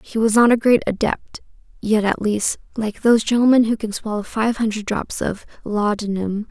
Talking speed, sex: 195 wpm, female